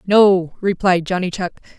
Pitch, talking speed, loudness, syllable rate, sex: 185 Hz, 135 wpm, -17 LUFS, 4.4 syllables/s, female